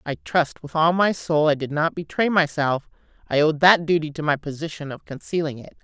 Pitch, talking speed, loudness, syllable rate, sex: 155 Hz, 215 wpm, -21 LUFS, 5.3 syllables/s, female